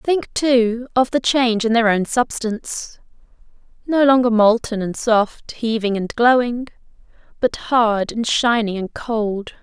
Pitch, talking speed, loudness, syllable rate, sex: 230 Hz, 135 wpm, -18 LUFS, 4.0 syllables/s, female